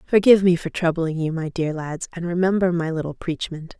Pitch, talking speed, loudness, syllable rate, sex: 170 Hz, 205 wpm, -21 LUFS, 5.6 syllables/s, female